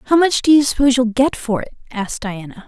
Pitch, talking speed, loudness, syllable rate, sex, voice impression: 245 Hz, 245 wpm, -16 LUFS, 6.0 syllables/s, female, feminine, adult-like, tensed, powerful, clear, fluent, intellectual, slightly friendly, lively, intense, sharp